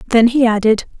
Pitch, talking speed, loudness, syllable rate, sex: 230 Hz, 180 wpm, -14 LUFS, 5.2 syllables/s, female